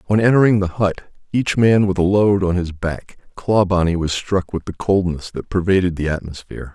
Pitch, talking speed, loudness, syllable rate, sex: 95 Hz, 195 wpm, -18 LUFS, 5.2 syllables/s, male